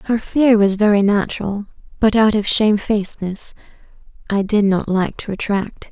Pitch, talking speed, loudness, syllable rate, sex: 205 Hz, 150 wpm, -17 LUFS, 5.0 syllables/s, female